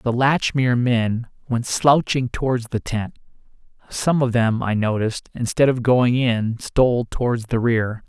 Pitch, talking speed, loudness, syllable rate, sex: 120 Hz, 155 wpm, -20 LUFS, 4.3 syllables/s, male